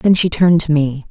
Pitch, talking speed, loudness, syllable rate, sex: 160 Hz, 270 wpm, -14 LUFS, 5.7 syllables/s, female